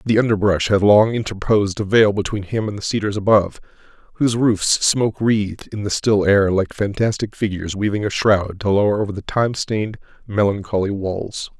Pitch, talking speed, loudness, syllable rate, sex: 105 Hz, 180 wpm, -18 LUFS, 5.5 syllables/s, male